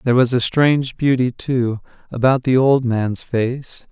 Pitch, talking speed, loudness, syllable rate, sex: 125 Hz, 170 wpm, -17 LUFS, 4.3 syllables/s, male